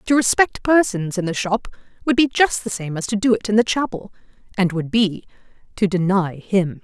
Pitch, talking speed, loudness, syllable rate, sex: 205 Hz, 210 wpm, -19 LUFS, 5.2 syllables/s, female